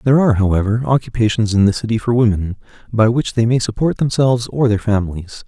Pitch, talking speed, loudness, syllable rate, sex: 115 Hz, 195 wpm, -16 LUFS, 6.4 syllables/s, male